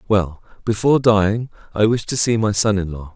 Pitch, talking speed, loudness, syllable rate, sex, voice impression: 105 Hz, 210 wpm, -18 LUFS, 5.6 syllables/s, male, very masculine, very middle-aged, very thick, slightly tensed, powerful, slightly dark, soft, slightly muffled, fluent, raspy, cool, very intellectual, refreshing, very sincere, very calm, mature, friendly, reassuring, unique, slightly elegant, slightly wild, sweet, lively, kind